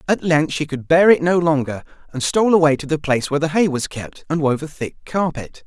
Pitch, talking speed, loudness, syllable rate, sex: 155 Hz, 255 wpm, -18 LUFS, 5.8 syllables/s, male